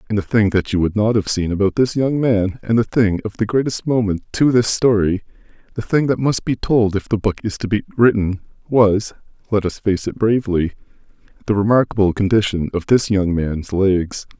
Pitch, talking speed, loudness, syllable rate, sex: 105 Hz, 200 wpm, -18 LUFS, 5.3 syllables/s, male